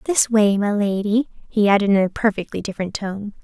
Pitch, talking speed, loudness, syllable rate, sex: 205 Hz, 190 wpm, -19 LUFS, 5.6 syllables/s, female